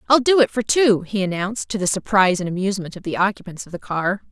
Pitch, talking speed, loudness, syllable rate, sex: 200 Hz, 250 wpm, -19 LUFS, 6.7 syllables/s, female